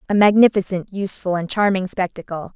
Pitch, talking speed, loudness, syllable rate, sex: 190 Hz, 140 wpm, -19 LUFS, 6.0 syllables/s, female